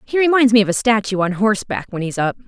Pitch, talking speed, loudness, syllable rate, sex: 215 Hz, 265 wpm, -17 LUFS, 6.7 syllables/s, female